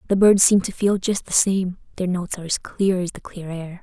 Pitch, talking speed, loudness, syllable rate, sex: 185 Hz, 265 wpm, -20 LUFS, 5.5 syllables/s, female